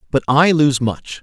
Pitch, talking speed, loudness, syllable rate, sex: 140 Hz, 195 wpm, -15 LUFS, 4.2 syllables/s, male